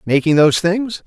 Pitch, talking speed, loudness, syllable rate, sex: 175 Hz, 170 wpm, -15 LUFS, 5.2 syllables/s, male